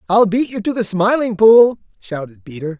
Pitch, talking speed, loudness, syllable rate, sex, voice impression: 205 Hz, 195 wpm, -14 LUFS, 5.0 syllables/s, male, very masculine, middle-aged, slightly thick, tensed, very powerful, very bright, slightly hard, very clear, very fluent, raspy, cool, very intellectual, refreshing, very sincere, calm, mature, very friendly, very reassuring, very unique, slightly elegant, wild, slightly sweet, very lively, slightly kind, intense